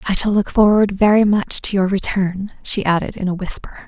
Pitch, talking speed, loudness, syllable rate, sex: 195 Hz, 215 wpm, -17 LUFS, 5.3 syllables/s, female